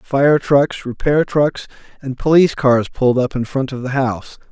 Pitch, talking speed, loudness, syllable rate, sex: 135 Hz, 185 wpm, -16 LUFS, 4.7 syllables/s, male